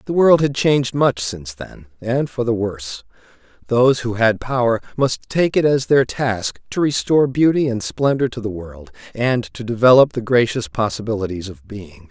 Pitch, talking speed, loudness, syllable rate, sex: 120 Hz, 185 wpm, -18 LUFS, 5.0 syllables/s, male